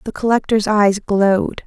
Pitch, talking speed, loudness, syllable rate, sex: 210 Hz, 145 wpm, -16 LUFS, 4.5 syllables/s, female